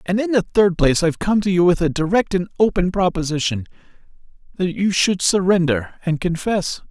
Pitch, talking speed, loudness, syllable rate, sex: 180 Hz, 175 wpm, -18 LUFS, 5.5 syllables/s, male